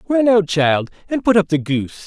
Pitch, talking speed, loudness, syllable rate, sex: 185 Hz, 230 wpm, -17 LUFS, 5.2 syllables/s, male